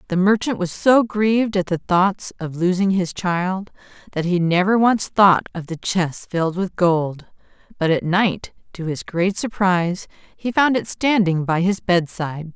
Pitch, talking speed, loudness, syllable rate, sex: 185 Hz, 175 wpm, -19 LUFS, 4.3 syllables/s, female